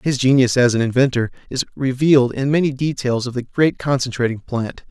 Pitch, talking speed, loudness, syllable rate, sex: 130 Hz, 185 wpm, -18 LUFS, 5.6 syllables/s, male